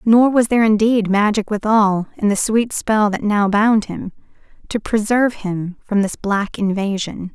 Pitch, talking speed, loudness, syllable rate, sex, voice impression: 210 Hz, 170 wpm, -17 LUFS, 4.4 syllables/s, female, feminine, slightly adult-like, soft, slightly halting, intellectual, friendly